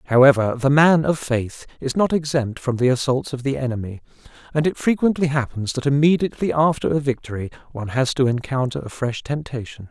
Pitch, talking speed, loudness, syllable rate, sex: 135 Hz, 180 wpm, -20 LUFS, 5.8 syllables/s, male